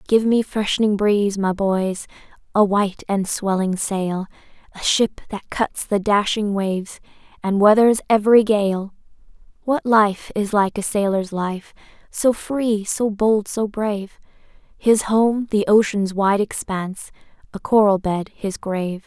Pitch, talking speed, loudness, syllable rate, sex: 205 Hz, 145 wpm, -19 LUFS, 4.1 syllables/s, female